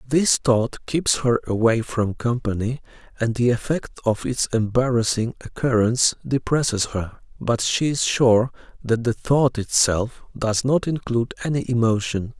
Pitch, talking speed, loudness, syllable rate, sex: 120 Hz, 140 wpm, -21 LUFS, 4.3 syllables/s, male